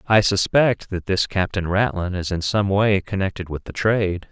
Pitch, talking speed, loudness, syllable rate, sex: 95 Hz, 195 wpm, -21 LUFS, 4.8 syllables/s, male